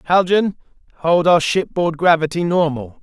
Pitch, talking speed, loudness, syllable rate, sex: 165 Hz, 120 wpm, -17 LUFS, 4.5 syllables/s, male